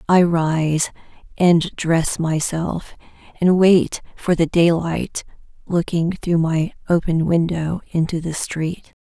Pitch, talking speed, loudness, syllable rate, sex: 165 Hz, 120 wpm, -19 LUFS, 3.4 syllables/s, female